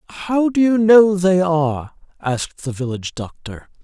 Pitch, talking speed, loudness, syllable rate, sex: 170 Hz, 155 wpm, -17 LUFS, 5.2 syllables/s, male